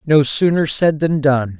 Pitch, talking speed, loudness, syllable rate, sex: 145 Hz, 190 wpm, -15 LUFS, 4.1 syllables/s, male